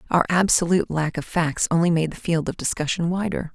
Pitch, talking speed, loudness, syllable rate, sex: 170 Hz, 205 wpm, -22 LUFS, 5.8 syllables/s, female